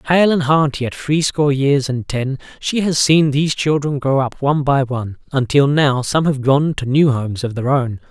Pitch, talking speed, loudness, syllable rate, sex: 140 Hz, 220 wpm, -16 LUFS, 5.1 syllables/s, male